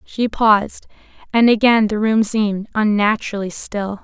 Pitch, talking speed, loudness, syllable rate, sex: 215 Hz, 135 wpm, -17 LUFS, 4.8 syllables/s, female